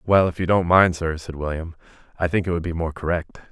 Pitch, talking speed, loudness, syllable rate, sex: 85 Hz, 255 wpm, -22 LUFS, 6.2 syllables/s, male